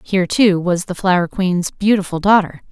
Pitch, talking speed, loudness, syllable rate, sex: 185 Hz, 175 wpm, -16 LUFS, 5.1 syllables/s, female